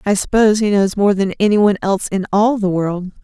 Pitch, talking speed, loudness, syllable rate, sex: 200 Hz, 225 wpm, -15 LUFS, 5.4 syllables/s, female